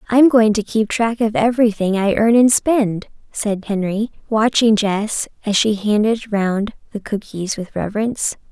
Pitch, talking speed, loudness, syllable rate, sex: 215 Hz, 160 wpm, -17 LUFS, 4.7 syllables/s, female